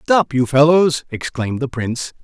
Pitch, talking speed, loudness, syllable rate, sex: 140 Hz, 160 wpm, -17 LUFS, 4.9 syllables/s, male